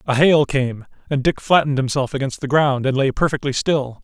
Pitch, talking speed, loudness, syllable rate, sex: 140 Hz, 210 wpm, -18 LUFS, 5.5 syllables/s, male